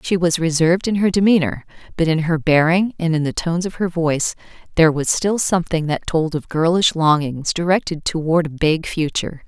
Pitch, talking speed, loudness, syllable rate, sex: 165 Hz, 195 wpm, -18 LUFS, 5.7 syllables/s, female